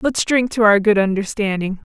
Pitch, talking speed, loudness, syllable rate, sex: 210 Hz, 190 wpm, -17 LUFS, 5.1 syllables/s, female